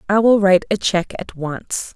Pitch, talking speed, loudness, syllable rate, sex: 195 Hz, 215 wpm, -17 LUFS, 5.2 syllables/s, female